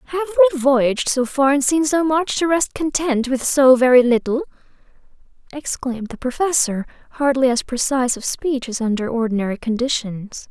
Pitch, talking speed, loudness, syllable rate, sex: 265 Hz, 160 wpm, -18 LUFS, 5.3 syllables/s, female